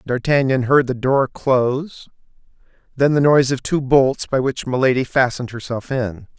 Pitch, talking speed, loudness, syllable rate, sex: 130 Hz, 160 wpm, -18 LUFS, 4.9 syllables/s, male